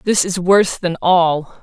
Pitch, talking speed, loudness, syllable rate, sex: 175 Hz, 185 wpm, -15 LUFS, 4.0 syllables/s, female